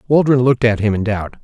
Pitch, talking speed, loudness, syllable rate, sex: 115 Hz, 250 wpm, -15 LUFS, 6.5 syllables/s, male